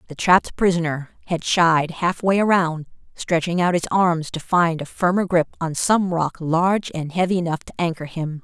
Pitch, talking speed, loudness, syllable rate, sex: 170 Hz, 185 wpm, -20 LUFS, 4.9 syllables/s, female